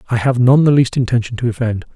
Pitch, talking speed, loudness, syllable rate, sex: 120 Hz, 245 wpm, -15 LUFS, 6.7 syllables/s, male